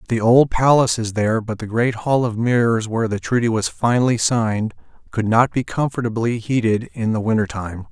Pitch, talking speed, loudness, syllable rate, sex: 115 Hz, 195 wpm, -19 LUFS, 5.5 syllables/s, male